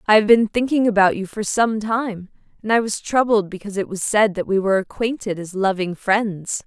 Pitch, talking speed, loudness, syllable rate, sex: 205 Hz, 215 wpm, -19 LUFS, 5.3 syllables/s, female